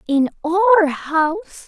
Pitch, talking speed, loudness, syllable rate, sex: 335 Hz, 105 wpm, -17 LUFS, 5.3 syllables/s, female